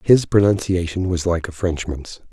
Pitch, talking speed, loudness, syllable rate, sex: 90 Hz, 155 wpm, -19 LUFS, 4.7 syllables/s, male